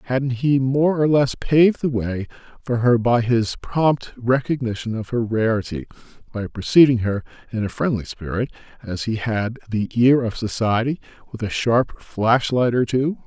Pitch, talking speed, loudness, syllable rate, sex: 120 Hz, 160 wpm, -20 LUFS, 4.5 syllables/s, male